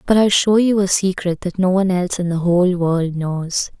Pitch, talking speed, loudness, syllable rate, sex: 185 Hz, 235 wpm, -17 LUFS, 5.3 syllables/s, female